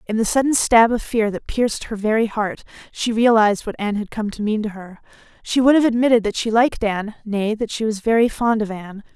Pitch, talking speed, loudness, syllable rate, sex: 220 Hz, 235 wpm, -19 LUFS, 6.0 syllables/s, female